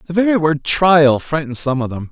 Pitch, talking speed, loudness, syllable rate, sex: 155 Hz, 225 wpm, -15 LUFS, 5.1 syllables/s, male